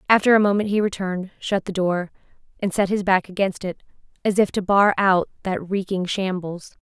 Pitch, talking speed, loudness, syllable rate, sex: 190 Hz, 195 wpm, -21 LUFS, 5.3 syllables/s, female